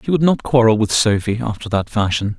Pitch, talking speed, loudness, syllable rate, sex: 115 Hz, 225 wpm, -17 LUFS, 5.8 syllables/s, male